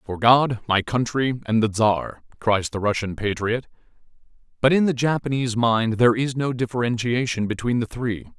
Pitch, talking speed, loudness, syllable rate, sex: 115 Hz, 165 wpm, -22 LUFS, 5.0 syllables/s, male